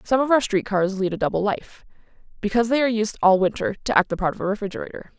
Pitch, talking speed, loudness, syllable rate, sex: 205 Hz, 255 wpm, -22 LUFS, 7.1 syllables/s, female